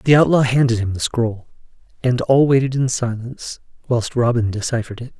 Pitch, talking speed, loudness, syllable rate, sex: 120 Hz, 175 wpm, -18 LUFS, 5.5 syllables/s, male